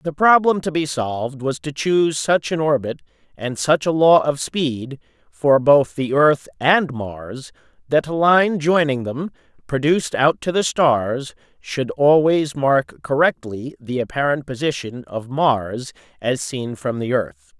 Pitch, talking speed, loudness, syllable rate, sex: 140 Hz, 160 wpm, -19 LUFS, 3.9 syllables/s, male